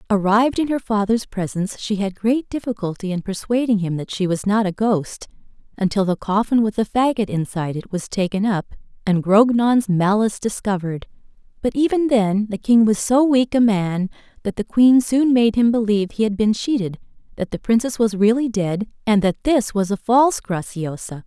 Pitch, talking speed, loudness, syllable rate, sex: 215 Hz, 190 wpm, -19 LUFS, 5.3 syllables/s, female